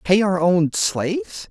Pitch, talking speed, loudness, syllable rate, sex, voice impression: 195 Hz, 160 wpm, -19 LUFS, 3.6 syllables/s, male, masculine, adult-like, tensed, powerful, bright, clear, fluent, slightly nasal, intellectual, calm, friendly, reassuring, slightly unique, slightly wild, lively, slightly kind